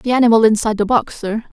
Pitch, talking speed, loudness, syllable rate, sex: 225 Hz, 225 wpm, -15 LUFS, 6.7 syllables/s, female